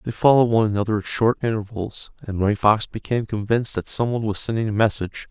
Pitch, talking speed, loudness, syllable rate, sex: 110 Hz, 215 wpm, -21 LUFS, 6.9 syllables/s, male